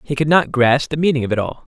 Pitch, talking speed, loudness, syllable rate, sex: 140 Hz, 310 wpm, -17 LUFS, 6.3 syllables/s, male